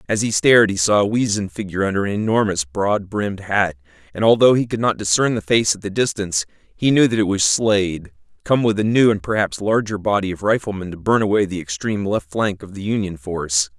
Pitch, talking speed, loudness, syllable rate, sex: 100 Hz, 225 wpm, -19 LUFS, 6.0 syllables/s, male